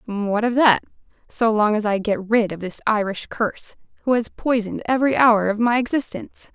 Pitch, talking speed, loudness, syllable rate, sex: 220 Hz, 195 wpm, -20 LUFS, 5.4 syllables/s, female